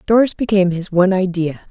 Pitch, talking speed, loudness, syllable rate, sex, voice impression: 190 Hz, 175 wpm, -16 LUFS, 6.4 syllables/s, female, feminine, adult-like, slightly intellectual, calm, slightly kind